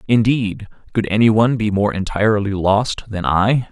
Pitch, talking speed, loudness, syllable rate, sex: 105 Hz, 145 wpm, -17 LUFS, 4.6 syllables/s, male